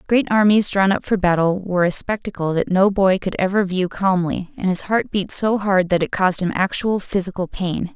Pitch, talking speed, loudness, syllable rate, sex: 190 Hz, 220 wpm, -19 LUFS, 5.2 syllables/s, female